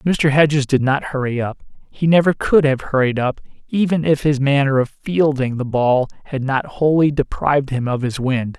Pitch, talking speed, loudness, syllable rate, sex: 140 Hz, 195 wpm, -18 LUFS, 4.9 syllables/s, male